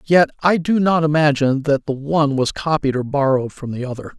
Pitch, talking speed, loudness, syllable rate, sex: 145 Hz, 215 wpm, -18 LUFS, 5.9 syllables/s, male